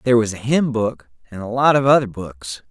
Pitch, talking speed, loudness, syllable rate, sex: 115 Hz, 245 wpm, -18 LUFS, 5.6 syllables/s, male